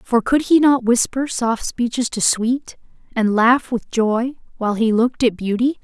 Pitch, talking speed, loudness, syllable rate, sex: 240 Hz, 185 wpm, -18 LUFS, 4.4 syllables/s, female